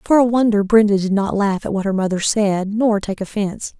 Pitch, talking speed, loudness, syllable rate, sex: 205 Hz, 235 wpm, -17 LUFS, 5.5 syllables/s, female